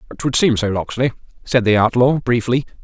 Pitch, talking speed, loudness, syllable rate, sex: 120 Hz, 170 wpm, -17 LUFS, 5.5 syllables/s, male